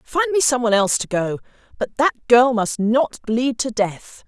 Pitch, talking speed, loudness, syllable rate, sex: 240 Hz, 210 wpm, -19 LUFS, 4.8 syllables/s, female